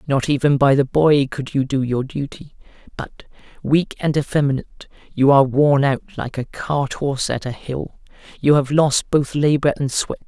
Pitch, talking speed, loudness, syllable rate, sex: 140 Hz, 185 wpm, -19 LUFS, 4.8 syllables/s, male